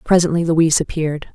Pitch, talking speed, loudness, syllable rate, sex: 160 Hz, 135 wpm, -17 LUFS, 6.6 syllables/s, female